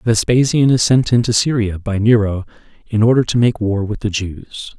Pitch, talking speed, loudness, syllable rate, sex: 110 Hz, 190 wpm, -15 LUFS, 5.5 syllables/s, male